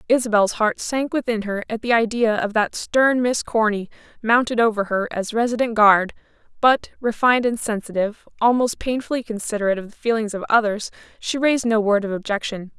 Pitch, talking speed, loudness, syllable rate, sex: 225 Hz, 175 wpm, -20 LUFS, 5.6 syllables/s, female